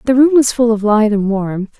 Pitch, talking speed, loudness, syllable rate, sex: 225 Hz, 265 wpm, -13 LUFS, 4.9 syllables/s, female